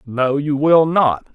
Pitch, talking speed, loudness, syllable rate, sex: 145 Hz, 180 wpm, -16 LUFS, 3.4 syllables/s, male